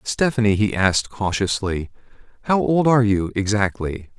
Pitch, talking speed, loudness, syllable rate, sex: 105 Hz, 130 wpm, -20 LUFS, 5.0 syllables/s, male